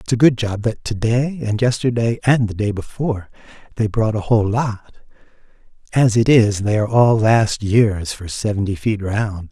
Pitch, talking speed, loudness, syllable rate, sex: 110 Hz, 190 wpm, -18 LUFS, 4.7 syllables/s, male